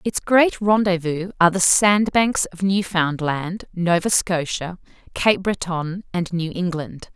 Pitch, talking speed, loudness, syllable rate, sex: 180 Hz, 125 wpm, -20 LUFS, 3.9 syllables/s, female